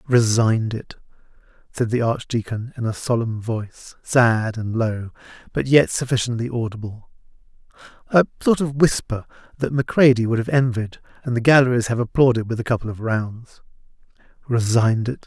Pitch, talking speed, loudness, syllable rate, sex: 120 Hz, 140 wpm, -20 LUFS, 5.2 syllables/s, male